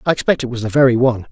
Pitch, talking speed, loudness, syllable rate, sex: 125 Hz, 320 wpm, -16 LUFS, 8.5 syllables/s, male